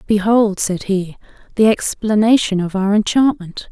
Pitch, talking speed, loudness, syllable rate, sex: 205 Hz, 130 wpm, -16 LUFS, 4.4 syllables/s, female